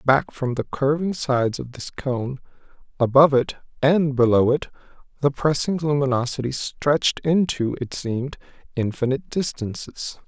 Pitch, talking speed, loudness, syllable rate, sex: 135 Hz, 130 wpm, -22 LUFS, 4.8 syllables/s, male